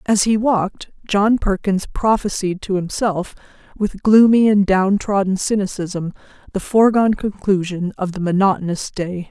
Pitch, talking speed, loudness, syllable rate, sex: 195 Hz, 130 wpm, -18 LUFS, 4.7 syllables/s, female